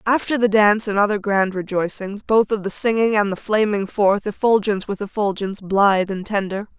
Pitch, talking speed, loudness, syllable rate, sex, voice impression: 205 Hz, 185 wpm, -19 LUFS, 5.5 syllables/s, female, feminine, slightly gender-neutral, adult-like, slightly middle-aged, thin, tensed, powerful, slightly bright, slightly hard, slightly clear, fluent, intellectual, sincere, slightly lively, strict, slightly sharp